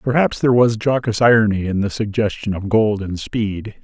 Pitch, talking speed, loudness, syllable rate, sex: 110 Hz, 190 wpm, -18 LUFS, 5.5 syllables/s, male